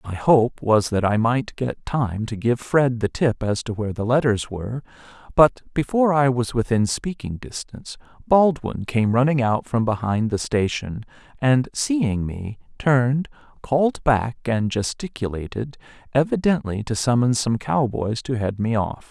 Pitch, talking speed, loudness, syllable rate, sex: 120 Hz, 160 wpm, -21 LUFS, 4.5 syllables/s, male